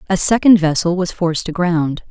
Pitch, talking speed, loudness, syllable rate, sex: 175 Hz, 170 wpm, -15 LUFS, 5.3 syllables/s, female